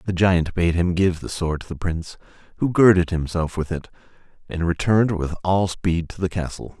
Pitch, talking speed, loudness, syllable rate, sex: 85 Hz, 205 wpm, -21 LUFS, 5.2 syllables/s, male